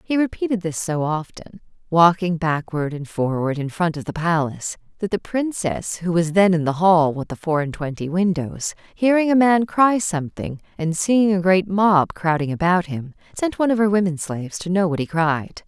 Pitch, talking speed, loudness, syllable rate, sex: 175 Hz, 205 wpm, -20 LUFS, 5.0 syllables/s, female